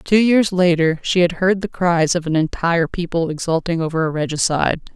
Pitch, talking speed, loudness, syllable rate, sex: 170 Hz, 195 wpm, -18 LUFS, 5.5 syllables/s, female